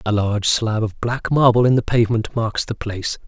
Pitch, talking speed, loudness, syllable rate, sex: 110 Hz, 220 wpm, -19 LUFS, 5.5 syllables/s, male